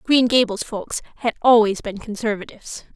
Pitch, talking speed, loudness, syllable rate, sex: 220 Hz, 140 wpm, -20 LUFS, 5.4 syllables/s, female